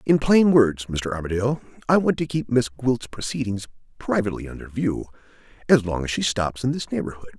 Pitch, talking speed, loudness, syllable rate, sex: 120 Hz, 185 wpm, -23 LUFS, 5.7 syllables/s, male